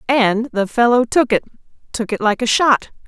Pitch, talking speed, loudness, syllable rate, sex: 235 Hz, 195 wpm, -16 LUFS, 4.8 syllables/s, female